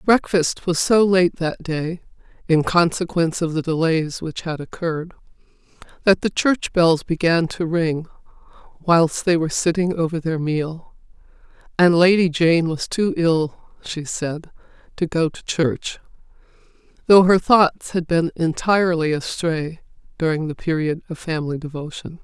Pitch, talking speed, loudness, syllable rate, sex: 165 Hz, 145 wpm, -20 LUFS, 4.4 syllables/s, female